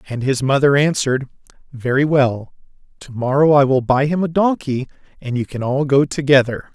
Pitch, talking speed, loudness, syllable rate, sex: 135 Hz, 180 wpm, -17 LUFS, 5.2 syllables/s, male